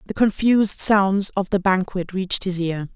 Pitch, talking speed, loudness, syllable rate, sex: 195 Hz, 185 wpm, -20 LUFS, 4.8 syllables/s, female